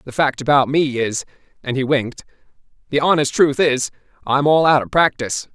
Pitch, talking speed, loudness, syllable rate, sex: 140 Hz, 160 wpm, -17 LUFS, 5.5 syllables/s, male